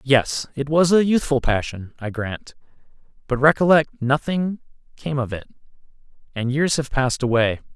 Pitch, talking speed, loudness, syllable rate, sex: 135 Hz, 145 wpm, -21 LUFS, 4.7 syllables/s, male